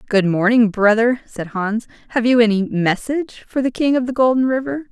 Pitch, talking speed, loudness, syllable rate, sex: 235 Hz, 195 wpm, -17 LUFS, 5.3 syllables/s, female